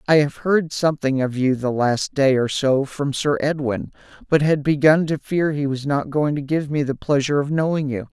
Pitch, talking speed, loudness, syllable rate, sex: 145 Hz, 225 wpm, -20 LUFS, 5.0 syllables/s, male